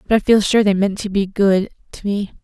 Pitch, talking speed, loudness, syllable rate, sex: 200 Hz, 270 wpm, -17 LUFS, 5.6 syllables/s, female